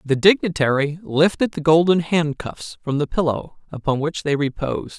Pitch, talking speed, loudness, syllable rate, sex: 155 Hz, 155 wpm, -20 LUFS, 4.9 syllables/s, male